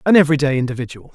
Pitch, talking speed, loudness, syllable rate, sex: 140 Hz, 155 wpm, -17 LUFS, 8.8 syllables/s, male